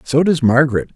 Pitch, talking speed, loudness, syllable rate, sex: 140 Hz, 190 wpm, -15 LUFS, 6.1 syllables/s, male